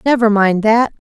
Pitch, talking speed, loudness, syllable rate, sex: 220 Hz, 155 wpm, -14 LUFS, 4.7 syllables/s, female